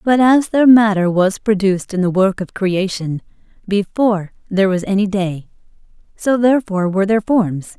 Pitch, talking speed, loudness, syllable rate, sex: 200 Hz, 160 wpm, -16 LUFS, 5.2 syllables/s, female